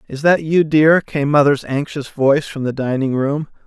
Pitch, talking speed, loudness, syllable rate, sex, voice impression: 145 Hz, 195 wpm, -16 LUFS, 4.8 syllables/s, male, very masculine, very adult-like, middle-aged, very thick, slightly tensed, powerful, slightly dark, soft, clear, slightly halting, cool, intellectual, slightly refreshing, very sincere, very calm, mature, friendly, very reassuring, slightly unique, slightly elegant, slightly wild, slightly sweet, kind